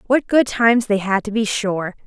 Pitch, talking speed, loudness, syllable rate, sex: 215 Hz, 235 wpm, -18 LUFS, 5.0 syllables/s, female